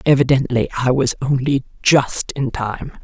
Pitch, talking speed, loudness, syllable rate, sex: 130 Hz, 140 wpm, -18 LUFS, 4.3 syllables/s, female